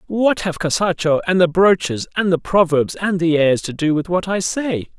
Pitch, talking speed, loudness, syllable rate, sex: 175 Hz, 215 wpm, -17 LUFS, 4.8 syllables/s, male